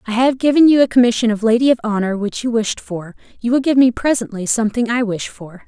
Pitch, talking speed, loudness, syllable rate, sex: 230 Hz, 245 wpm, -16 LUFS, 6.1 syllables/s, female